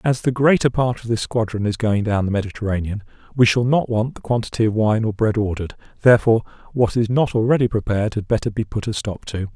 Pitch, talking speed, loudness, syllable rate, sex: 110 Hz, 225 wpm, -20 LUFS, 6.3 syllables/s, male